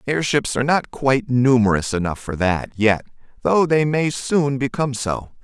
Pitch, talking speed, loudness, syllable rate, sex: 130 Hz, 165 wpm, -19 LUFS, 4.8 syllables/s, male